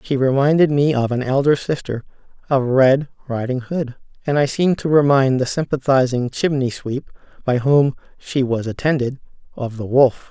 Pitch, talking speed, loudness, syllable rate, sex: 135 Hz, 165 wpm, -18 LUFS, 4.9 syllables/s, male